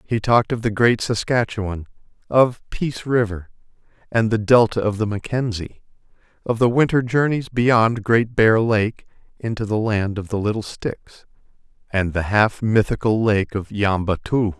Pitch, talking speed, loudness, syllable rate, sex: 110 Hz, 155 wpm, -20 LUFS, 4.6 syllables/s, male